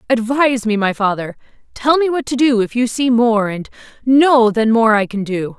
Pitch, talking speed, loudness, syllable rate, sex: 235 Hz, 215 wpm, -15 LUFS, 4.9 syllables/s, female